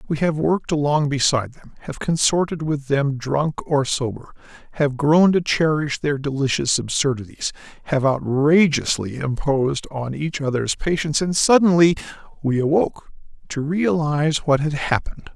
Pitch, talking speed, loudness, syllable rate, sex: 145 Hz, 135 wpm, -20 LUFS, 4.9 syllables/s, male